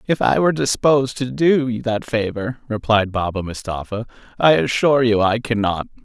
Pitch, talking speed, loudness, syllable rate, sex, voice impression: 115 Hz, 170 wpm, -19 LUFS, 5.2 syllables/s, male, masculine, adult-like, slightly thick, tensed, powerful, bright, soft, cool, slightly refreshing, friendly, wild, lively, kind, light